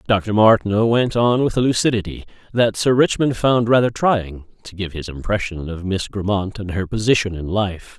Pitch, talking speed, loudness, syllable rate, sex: 105 Hz, 190 wpm, -19 LUFS, 5.0 syllables/s, male